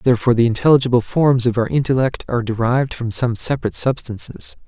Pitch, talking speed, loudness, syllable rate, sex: 125 Hz, 165 wpm, -17 LUFS, 6.7 syllables/s, male